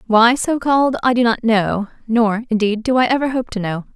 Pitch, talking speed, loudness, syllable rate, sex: 230 Hz, 210 wpm, -17 LUFS, 5.3 syllables/s, female